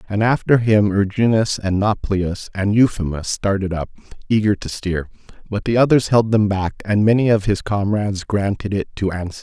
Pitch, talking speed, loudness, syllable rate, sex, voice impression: 105 Hz, 180 wpm, -18 LUFS, 5.0 syllables/s, male, masculine, adult-like, slightly thick, cool, sincere, slightly calm, kind